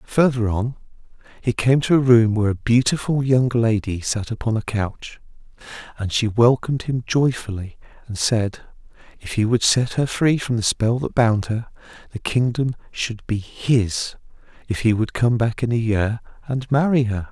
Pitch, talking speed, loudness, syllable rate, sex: 115 Hz, 175 wpm, -20 LUFS, 4.6 syllables/s, male